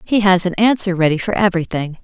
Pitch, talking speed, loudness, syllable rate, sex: 185 Hz, 205 wpm, -16 LUFS, 6.3 syllables/s, female